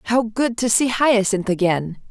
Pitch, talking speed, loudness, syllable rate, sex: 220 Hz, 170 wpm, -19 LUFS, 4.0 syllables/s, female